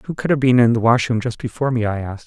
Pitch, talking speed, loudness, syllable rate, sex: 120 Hz, 320 wpm, -18 LUFS, 7.2 syllables/s, male